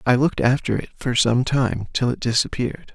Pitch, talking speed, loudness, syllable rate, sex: 125 Hz, 205 wpm, -21 LUFS, 5.5 syllables/s, male